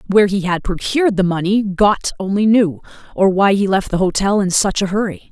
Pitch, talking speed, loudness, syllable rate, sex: 195 Hz, 215 wpm, -16 LUFS, 5.5 syllables/s, female